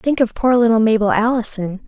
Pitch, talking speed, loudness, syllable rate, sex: 225 Hz, 190 wpm, -16 LUFS, 5.6 syllables/s, female